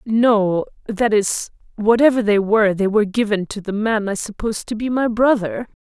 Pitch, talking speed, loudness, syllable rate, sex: 215 Hz, 165 wpm, -18 LUFS, 5.1 syllables/s, female